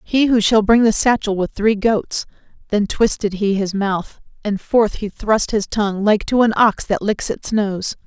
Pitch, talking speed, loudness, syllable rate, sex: 210 Hz, 210 wpm, -17 LUFS, 4.3 syllables/s, female